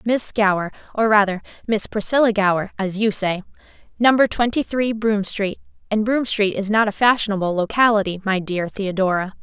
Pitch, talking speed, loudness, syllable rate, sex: 210 Hz, 165 wpm, -19 LUFS, 5.5 syllables/s, female